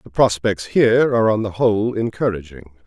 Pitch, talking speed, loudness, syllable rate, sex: 105 Hz, 165 wpm, -18 LUFS, 5.5 syllables/s, male